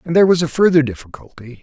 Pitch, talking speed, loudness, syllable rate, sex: 145 Hz, 220 wpm, -15 LUFS, 7.2 syllables/s, male